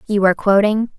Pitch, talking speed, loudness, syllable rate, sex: 205 Hz, 185 wpm, -15 LUFS, 6.3 syllables/s, female